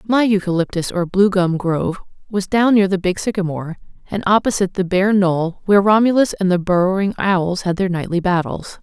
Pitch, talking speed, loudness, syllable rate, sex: 190 Hz, 185 wpm, -17 LUFS, 5.5 syllables/s, female